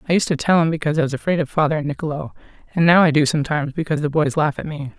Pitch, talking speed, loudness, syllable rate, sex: 155 Hz, 290 wpm, -19 LUFS, 8.0 syllables/s, female